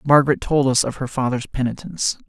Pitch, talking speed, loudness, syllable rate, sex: 130 Hz, 185 wpm, -20 LUFS, 6.3 syllables/s, male